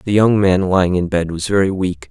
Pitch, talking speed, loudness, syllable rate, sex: 95 Hz, 255 wpm, -16 LUFS, 5.5 syllables/s, male